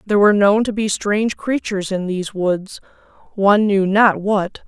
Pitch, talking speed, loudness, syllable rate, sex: 200 Hz, 180 wpm, -17 LUFS, 5.3 syllables/s, female